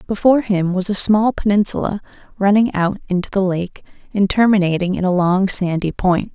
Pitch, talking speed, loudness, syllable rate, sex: 195 Hz, 170 wpm, -17 LUFS, 5.4 syllables/s, female